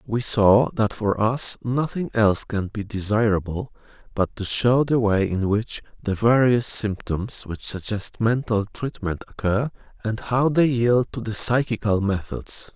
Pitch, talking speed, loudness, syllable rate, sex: 110 Hz, 155 wpm, -22 LUFS, 4.1 syllables/s, male